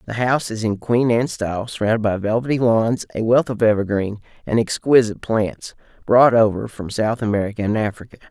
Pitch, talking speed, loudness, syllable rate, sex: 110 Hz, 180 wpm, -19 LUFS, 5.8 syllables/s, male